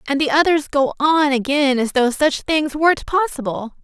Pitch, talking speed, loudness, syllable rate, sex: 285 Hz, 190 wpm, -17 LUFS, 5.0 syllables/s, female